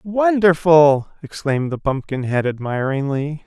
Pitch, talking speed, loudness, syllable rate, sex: 150 Hz, 85 wpm, -18 LUFS, 4.2 syllables/s, male